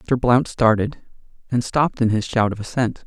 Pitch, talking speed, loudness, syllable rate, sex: 115 Hz, 195 wpm, -20 LUFS, 5.1 syllables/s, male